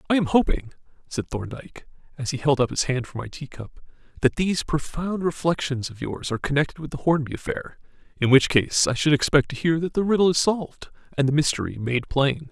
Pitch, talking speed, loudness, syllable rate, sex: 145 Hz, 210 wpm, -23 LUFS, 5.8 syllables/s, male